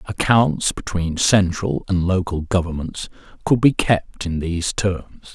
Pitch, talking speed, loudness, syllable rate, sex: 95 Hz, 135 wpm, -20 LUFS, 3.9 syllables/s, male